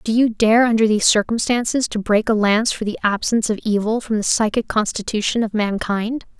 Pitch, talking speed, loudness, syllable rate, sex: 220 Hz, 195 wpm, -18 LUFS, 5.7 syllables/s, female